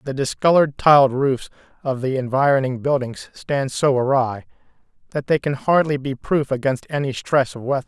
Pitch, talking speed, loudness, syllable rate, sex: 135 Hz, 170 wpm, -20 LUFS, 5.2 syllables/s, male